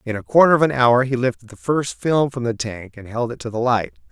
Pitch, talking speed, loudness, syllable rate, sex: 125 Hz, 290 wpm, -19 LUFS, 5.7 syllables/s, male